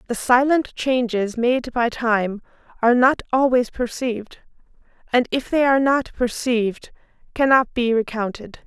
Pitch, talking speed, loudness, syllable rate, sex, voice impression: 240 Hz, 130 wpm, -20 LUFS, 4.6 syllables/s, female, feminine, adult-like, tensed, powerful, bright, slightly soft, clear, raspy, intellectual, friendly, reassuring, lively, slightly kind